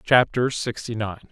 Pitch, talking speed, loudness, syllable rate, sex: 115 Hz, 135 wpm, -23 LUFS, 4.1 syllables/s, male